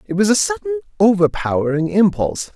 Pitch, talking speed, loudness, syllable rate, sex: 205 Hz, 140 wpm, -17 LUFS, 6.3 syllables/s, male